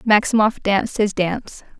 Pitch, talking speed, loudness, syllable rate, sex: 210 Hz, 135 wpm, -19 LUFS, 5.1 syllables/s, female